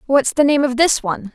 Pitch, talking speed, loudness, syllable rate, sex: 265 Hz, 265 wpm, -16 LUFS, 5.9 syllables/s, female